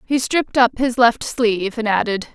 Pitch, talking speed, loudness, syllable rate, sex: 235 Hz, 205 wpm, -18 LUFS, 5.2 syllables/s, female